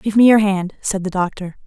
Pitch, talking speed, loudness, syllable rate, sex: 195 Hz, 250 wpm, -17 LUFS, 5.3 syllables/s, female